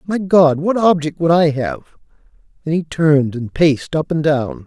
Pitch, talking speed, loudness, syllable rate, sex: 160 Hz, 195 wpm, -16 LUFS, 4.9 syllables/s, male